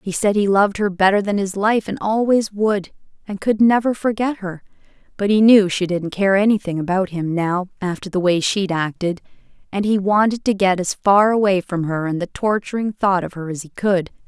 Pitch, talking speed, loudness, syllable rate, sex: 195 Hz, 215 wpm, -18 LUFS, 5.2 syllables/s, female